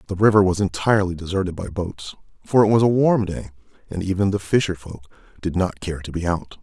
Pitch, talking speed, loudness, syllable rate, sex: 95 Hz, 215 wpm, -21 LUFS, 6.1 syllables/s, male